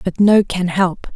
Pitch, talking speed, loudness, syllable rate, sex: 185 Hz, 205 wpm, -16 LUFS, 3.9 syllables/s, female